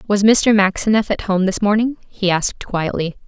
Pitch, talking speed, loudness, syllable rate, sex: 200 Hz, 185 wpm, -17 LUFS, 5.1 syllables/s, female